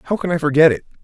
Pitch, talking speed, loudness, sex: 150 Hz, 290 wpm, -16 LUFS, male